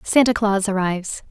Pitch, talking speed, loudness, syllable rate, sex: 205 Hz, 140 wpm, -19 LUFS, 5.1 syllables/s, female